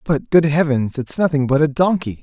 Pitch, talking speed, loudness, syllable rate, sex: 150 Hz, 215 wpm, -17 LUFS, 5.2 syllables/s, male